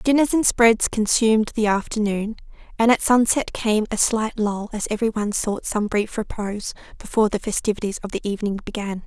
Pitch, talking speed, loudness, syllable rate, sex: 215 Hz, 170 wpm, -21 LUFS, 5.5 syllables/s, female